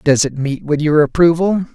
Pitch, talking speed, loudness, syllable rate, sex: 150 Hz, 205 wpm, -15 LUFS, 4.9 syllables/s, male